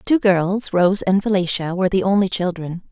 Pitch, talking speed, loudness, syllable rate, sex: 190 Hz, 205 wpm, -18 LUFS, 5.6 syllables/s, female